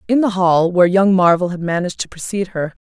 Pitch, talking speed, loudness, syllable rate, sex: 185 Hz, 235 wpm, -16 LUFS, 6.5 syllables/s, female